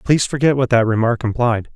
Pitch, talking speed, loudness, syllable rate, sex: 120 Hz, 205 wpm, -17 LUFS, 6.1 syllables/s, male